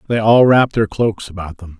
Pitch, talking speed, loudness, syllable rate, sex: 105 Hz, 235 wpm, -14 LUFS, 5.7 syllables/s, male